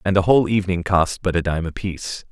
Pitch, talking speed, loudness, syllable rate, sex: 90 Hz, 235 wpm, -20 LUFS, 6.5 syllables/s, male